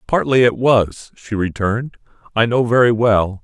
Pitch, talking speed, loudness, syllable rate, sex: 110 Hz, 155 wpm, -16 LUFS, 4.5 syllables/s, male